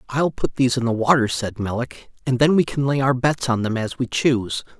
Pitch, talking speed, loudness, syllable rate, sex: 125 Hz, 250 wpm, -20 LUFS, 5.5 syllables/s, male